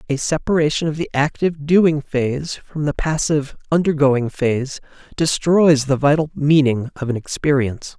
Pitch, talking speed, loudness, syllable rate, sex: 145 Hz, 145 wpm, -18 LUFS, 5.0 syllables/s, male